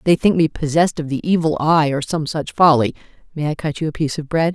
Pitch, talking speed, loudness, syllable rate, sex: 150 Hz, 250 wpm, -18 LUFS, 6.1 syllables/s, female